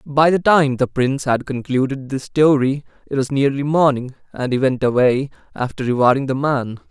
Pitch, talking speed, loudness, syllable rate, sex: 135 Hz, 180 wpm, -18 LUFS, 5.1 syllables/s, male